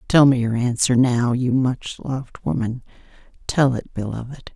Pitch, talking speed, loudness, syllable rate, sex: 125 Hz, 145 wpm, -20 LUFS, 4.6 syllables/s, female